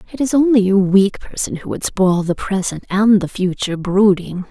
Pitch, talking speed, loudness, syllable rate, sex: 195 Hz, 200 wpm, -16 LUFS, 5.0 syllables/s, female